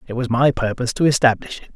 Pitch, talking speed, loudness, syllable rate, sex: 125 Hz, 240 wpm, -18 LUFS, 7.1 syllables/s, male